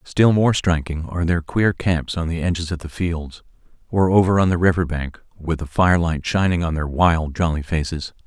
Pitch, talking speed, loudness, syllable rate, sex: 85 Hz, 205 wpm, -20 LUFS, 5.1 syllables/s, male